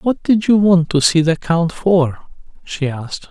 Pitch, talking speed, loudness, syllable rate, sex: 170 Hz, 200 wpm, -15 LUFS, 4.3 syllables/s, male